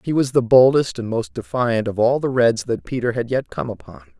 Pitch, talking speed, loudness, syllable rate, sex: 115 Hz, 245 wpm, -19 LUFS, 5.3 syllables/s, male